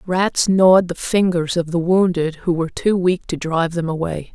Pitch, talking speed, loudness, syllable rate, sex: 175 Hz, 205 wpm, -18 LUFS, 5.0 syllables/s, female